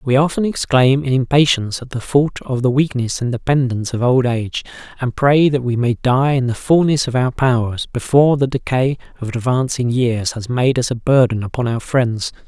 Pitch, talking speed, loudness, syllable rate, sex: 125 Hz, 200 wpm, -17 LUFS, 5.2 syllables/s, male